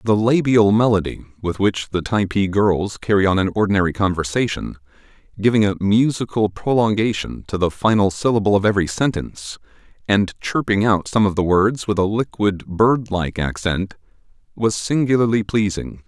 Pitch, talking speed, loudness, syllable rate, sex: 100 Hz, 150 wpm, -19 LUFS, 5.2 syllables/s, male